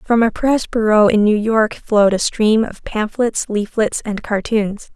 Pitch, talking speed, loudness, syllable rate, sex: 215 Hz, 180 wpm, -16 LUFS, 4.1 syllables/s, female